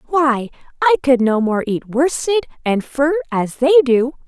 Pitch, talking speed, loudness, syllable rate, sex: 275 Hz, 170 wpm, -17 LUFS, 4.3 syllables/s, female